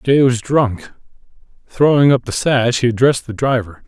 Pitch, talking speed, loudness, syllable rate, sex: 125 Hz, 155 wpm, -15 LUFS, 4.9 syllables/s, male